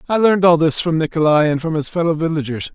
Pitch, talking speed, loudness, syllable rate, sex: 160 Hz, 240 wpm, -16 LUFS, 6.2 syllables/s, male